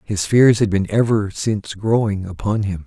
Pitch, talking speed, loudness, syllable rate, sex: 105 Hz, 190 wpm, -18 LUFS, 4.7 syllables/s, male